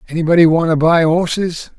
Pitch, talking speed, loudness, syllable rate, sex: 165 Hz, 170 wpm, -14 LUFS, 5.7 syllables/s, male